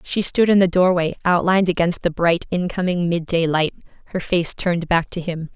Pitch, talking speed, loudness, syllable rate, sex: 175 Hz, 195 wpm, -19 LUFS, 5.3 syllables/s, female